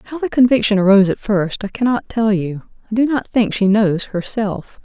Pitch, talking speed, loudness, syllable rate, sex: 215 Hz, 210 wpm, -16 LUFS, 5.3 syllables/s, female